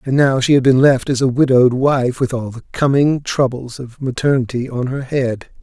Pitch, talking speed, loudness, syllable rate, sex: 130 Hz, 215 wpm, -16 LUFS, 5.0 syllables/s, male